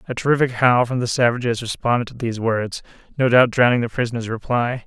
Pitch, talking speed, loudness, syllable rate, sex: 120 Hz, 185 wpm, -19 LUFS, 6.2 syllables/s, male